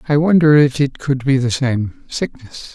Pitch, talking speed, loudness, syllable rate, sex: 135 Hz, 195 wpm, -16 LUFS, 4.4 syllables/s, male